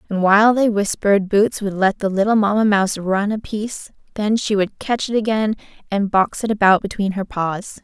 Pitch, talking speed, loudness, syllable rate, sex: 205 Hz, 205 wpm, -18 LUFS, 5.3 syllables/s, female